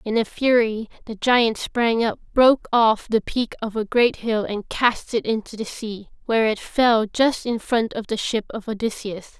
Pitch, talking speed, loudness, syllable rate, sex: 225 Hz, 205 wpm, -21 LUFS, 4.5 syllables/s, female